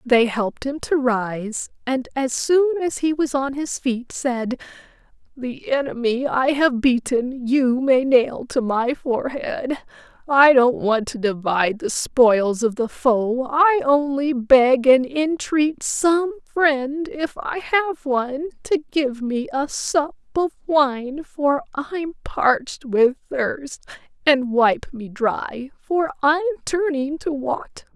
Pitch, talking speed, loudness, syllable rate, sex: 270 Hz, 145 wpm, -20 LUFS, 3.4 syllables/s, female